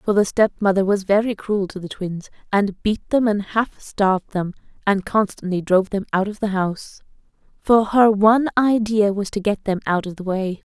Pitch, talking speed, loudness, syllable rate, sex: 200 Hz, 205 wpm, -20 LUFS, 5.0 syllables/s, female